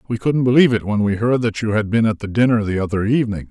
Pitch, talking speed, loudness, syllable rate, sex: 110 Hz, 290 wpm, -18 LUFS, 7.0 syllables/s, male